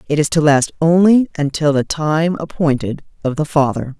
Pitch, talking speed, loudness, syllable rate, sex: 155 Hz, 180 wpm, -16 LUFS, 4.9 syllables/s, female